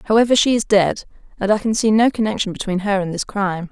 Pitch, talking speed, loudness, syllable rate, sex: 205 Hz, 240 wpm, -18 LUFS, 6.3 syllables/s, female